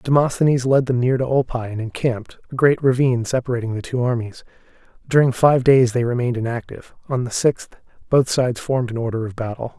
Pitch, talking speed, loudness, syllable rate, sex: 125 Hz, 190 wpm, -19 LUFS, 6.2 syllables/s, male